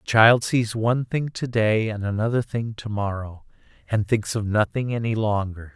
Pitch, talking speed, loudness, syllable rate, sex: 110 Hz, 190 wpm, -23 LUFS, 4.8 syllables/s, male